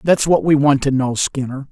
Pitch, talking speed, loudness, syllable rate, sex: 140 Hz, 245 wpm, -16 LUFS, 5.0 syllables/s, male